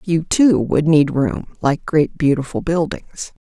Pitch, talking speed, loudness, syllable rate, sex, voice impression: 160 Hz, 140 wpm, -17 LUFS, 3.9 syllables/s, female, very feminine, middle-aged, slightly thin, tensed, slightly weak, bright, hard, clear, fluent, slightly raspy, cool, very intellectual, slightly refreshing, very sincere, very calm, friendly, reassuring, unique, slightly elegant, wild, slightly sweet, kind, slightly sharp, modest